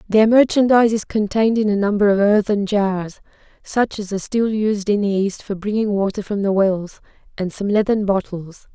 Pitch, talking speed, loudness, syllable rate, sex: 205 Hz, 190 wpm, -18 LUFS, 5.2 syllables/s, female